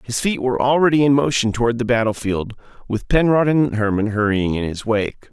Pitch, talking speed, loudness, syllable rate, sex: 120 Hz, 190 wpm, -18 LUFS, 5.6 syllables/s, male